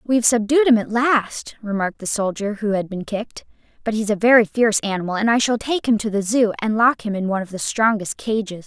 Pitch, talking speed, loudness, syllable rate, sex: 215 Hz, 240 wpm, -19 LUFS, 6.0 syllables/s, female